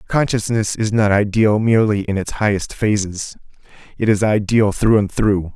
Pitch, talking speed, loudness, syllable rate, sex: 105 Hz, 160 wpm, -17 LUFS, 4.8 syllables/s, male